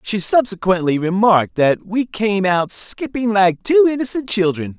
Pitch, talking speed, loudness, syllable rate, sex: 205 Hz, 150 wpm, -17 LUFS, 4.5 syllables/s, male